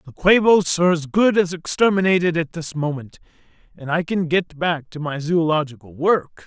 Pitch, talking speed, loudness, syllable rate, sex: 165 Hz, 175 wpm, -19 LUFS, 5.0 syllables/s, male